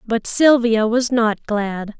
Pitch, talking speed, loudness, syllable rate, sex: 225 Hz, 150 wpm, -17 LUFS, 3.2 syllables/s, female